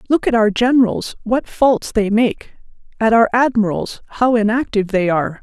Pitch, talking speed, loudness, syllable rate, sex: 225 Hz, 165 wpm, -16 LUFS, 5.2 syllables/s, female